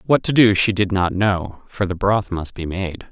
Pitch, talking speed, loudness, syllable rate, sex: 95 Hz, 250 wpm, -19 LUFS, 4.5 syllables/s, male